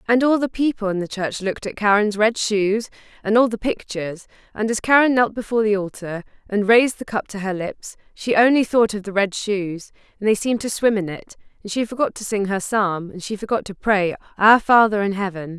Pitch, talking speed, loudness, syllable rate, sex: 210 Hz, 230 wpm, -20 LUFS, 5.6 syllables/s, female